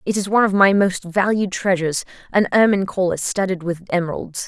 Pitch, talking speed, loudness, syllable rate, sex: 190 Hz, 175 wpm, -19 LUFS, 6.1 syllables/s, female